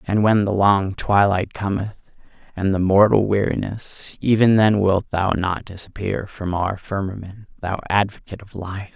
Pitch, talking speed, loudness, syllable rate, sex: 100 Hz, 155 wpm, -20 LUFS, 4.4 syllables/s, male